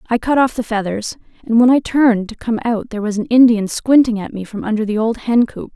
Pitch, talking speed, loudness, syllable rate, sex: 225 Hz, 260 wpm, -16 LUFS, 5.9 syllables/s, female